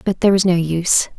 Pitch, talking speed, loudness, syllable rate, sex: 180 Hz, 255 wpm, -16 LUFS, 6.8 syllables/s, female